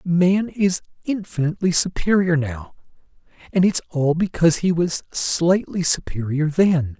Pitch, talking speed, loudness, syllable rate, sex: 170 Hz, 120 wpm, -20 LUFS, 4.4 syllables/s, male